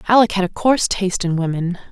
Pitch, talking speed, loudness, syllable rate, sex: 190 Hz, 220 wpm, -18 LUFS, 6.8 syllables/s, female